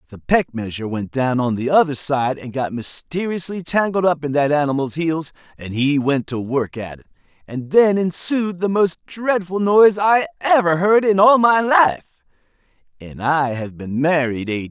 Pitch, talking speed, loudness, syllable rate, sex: 155 Hz, 190 wpm, -18 LUFS, 4.9 syllables/s, male